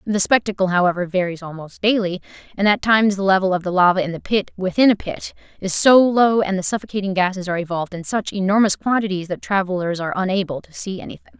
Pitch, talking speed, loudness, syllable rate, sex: 190 Hz, 210 wpm, -19 LUFS, 6.5 syllables/s, female